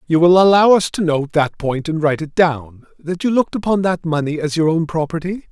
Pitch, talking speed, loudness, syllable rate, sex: 165 Hz, 240 wpm, -16 LUFS, 5.5 syllables/s, male